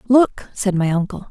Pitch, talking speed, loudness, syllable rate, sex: 205 Hz, 185 wpm, -19 LUFS, 4.5 syllables/s, female